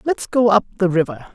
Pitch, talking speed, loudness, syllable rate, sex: 200 Hz, 225 wpm, -18 LUFS, 5.6 syllables/s, female